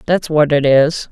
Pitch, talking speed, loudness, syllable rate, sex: 150 Hz, 215 wpm, -13 LUFS, 4.2 syllables/s, female